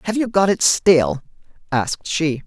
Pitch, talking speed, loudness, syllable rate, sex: 165 Hz, 170 wpm, -18 LUFS, 4.4 syllables/s, male